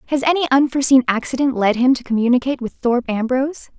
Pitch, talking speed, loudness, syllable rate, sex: 255 Hz, 175 wpm, -17 LUFS, 7.0 syllables/s, female